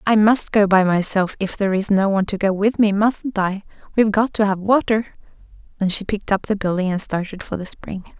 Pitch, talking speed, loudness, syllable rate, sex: 200 Hz, 235 wpm, -19 LUFS, 5.7 syllables/s, female